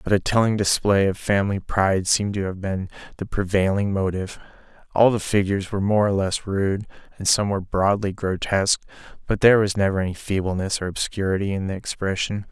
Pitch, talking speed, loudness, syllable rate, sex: 100 Hz, 180 wpm, -22 LUFS, 6.0 syllables/s, male